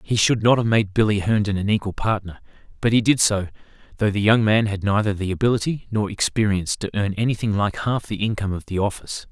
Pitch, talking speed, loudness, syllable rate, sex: 105 Hz, 220 wpm, -21 LUFS, 6.2 syllables/s, male